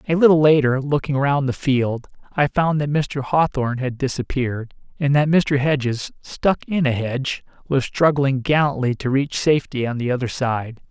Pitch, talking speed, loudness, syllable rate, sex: 135 Hz, 175 wpm, -20 LUFS, 4.8 syllables/s, male